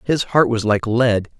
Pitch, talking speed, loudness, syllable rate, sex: 115 Hz, 215 wpm, -17 LUFS, 4.1 syllables/s, male